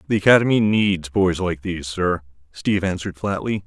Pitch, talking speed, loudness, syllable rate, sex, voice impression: 95 Hz, 165 wpm, -20 LUFS, 5.2 syllables/s, male, masculine, adult-like, thick, tensed, slightly powerful, clear, intellectual, calm, friendly, wild, lively, kind, slightly modest